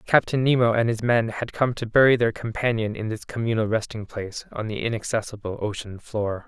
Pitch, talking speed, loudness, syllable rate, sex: 115 Hz, 195 wpm, -24 LUFS, 5.5 syllables/s, male